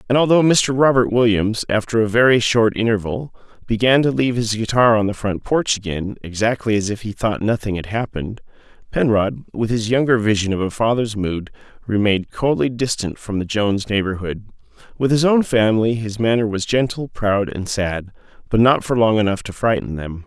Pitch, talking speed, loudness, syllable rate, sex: 110 Hz, 185 wpm, -18 LUFS, 5.4 syllables/s, male